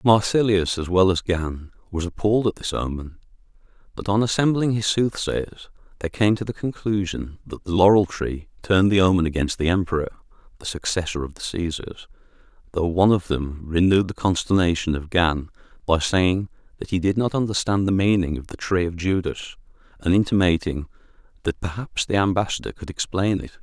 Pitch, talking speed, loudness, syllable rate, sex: 90 Hz, 170 wpm, -22 LUFS, 5.6 syllables/s, male